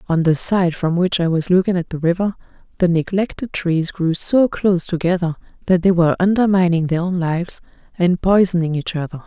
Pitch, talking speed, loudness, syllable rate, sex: 175 Hz, 190 wpm, -18 LUFS, 5.5 syllables/s, female